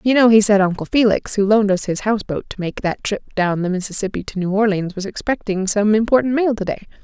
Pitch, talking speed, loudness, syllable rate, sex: 205 Hz, 240 wpm, -18 LUFS, 6.1 syllables/s, female